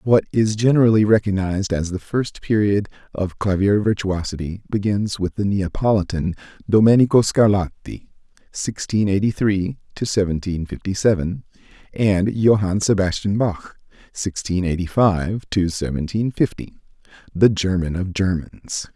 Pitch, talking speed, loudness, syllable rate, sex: 100 Hz, 120 wpm, -20 LUFS, 4.5 syllables/s, male